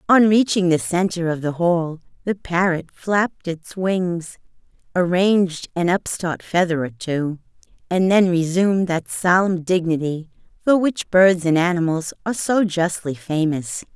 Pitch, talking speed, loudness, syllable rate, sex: 175 Hz, 140 wpm, -20 LUFS, 4.3 syllables/s, female